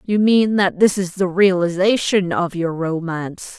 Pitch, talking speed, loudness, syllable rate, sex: 185 Hz, 165 wpm, -18 LUFS, 4.3 syllables/s, female